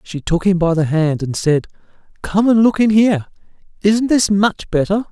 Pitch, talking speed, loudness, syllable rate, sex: 190 Hz, 190 wpm, -16 LUFS, 4.9 syllables/s, male